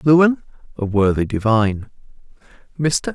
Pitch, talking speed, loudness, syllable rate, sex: 130 Hz, 95 wpm, -18 LUFS, 4.8 syllables/s, male